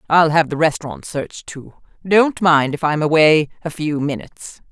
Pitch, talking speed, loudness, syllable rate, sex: 155 Hz, 190 wpm, -17 LUFS, 5.2 syllables/s, female